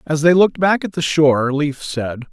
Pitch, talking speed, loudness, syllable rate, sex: 150 Hz, 235 wpm, -16 LUFS, 5.2 syllables/s, male